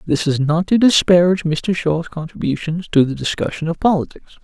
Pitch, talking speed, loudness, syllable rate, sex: 165 Hz, 175 wpm, -17 LUFS, 5.5 syllables/s, male